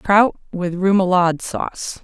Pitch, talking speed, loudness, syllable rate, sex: 185 Hz, 120 wpm, -18 LUFS, 4.6 syllables/s, female